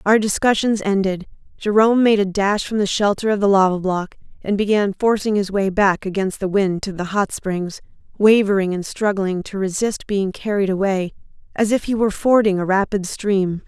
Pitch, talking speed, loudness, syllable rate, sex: 200 Hz, 190 wpm, -19 LUFS, 5.1 syllables/s, female